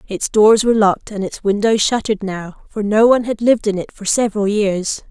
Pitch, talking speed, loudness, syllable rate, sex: 210 Hz, 225 wpm, -16 LUFS, 5.8 syllables/s, female